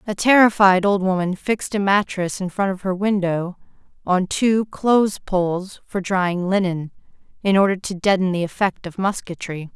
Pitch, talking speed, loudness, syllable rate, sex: 190 Hz, 165 wpm, -20 LUFS, 4.8 syllables/s, female